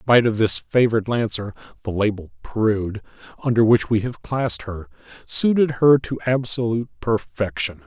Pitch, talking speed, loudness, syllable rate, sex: 115 Hz, 155 wpm, -20 LUFS, 5.2 syllables/s, male